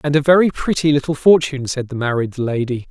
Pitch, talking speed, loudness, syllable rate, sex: 140 Hz, 205 wpm, -17 LUFS, 6.1 syllables/s, male